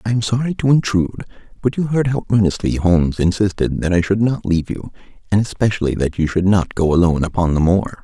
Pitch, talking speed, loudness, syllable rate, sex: 100 Hz, 215 wpm, -17 LUFS, 6.3 syllables/s, male